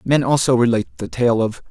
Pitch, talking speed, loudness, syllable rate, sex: 125 Hz, 210 wpm, -17 LUFS, 6.2 syllables/s, male